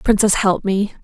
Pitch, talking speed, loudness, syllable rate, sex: 200 Hz, 175 wpm, -17 LUFS, 4.6 syllables/s, female